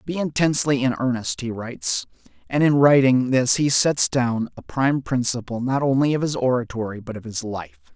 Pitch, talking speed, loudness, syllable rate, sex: 130 Hz, 190 wpm, -21 LUFS, 5.3 syllables/s, male